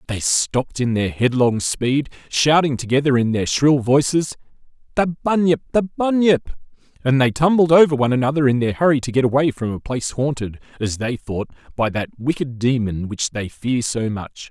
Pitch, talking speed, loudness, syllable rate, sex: 130 Hz, 180 wpm, -19 LUFS, 5.2 syllables/s, male